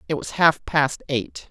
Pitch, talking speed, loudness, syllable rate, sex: 145 Hz, 200 wpm, -21 LUFS, 3.9 syllables/s, female